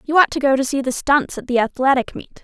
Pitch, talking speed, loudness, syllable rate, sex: 265 Hz, 295 wpm, -18 LUFS, 6.1 syllables/s, female